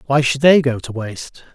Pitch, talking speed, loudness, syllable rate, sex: 135 Hz, 235 wpm, -16 LUFS, 5.4 syllables/s, male